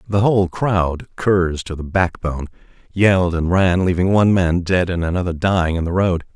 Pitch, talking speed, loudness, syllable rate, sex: 90 Hz, 170 wpm, -18 LUFS, 5.2 syllables/s, male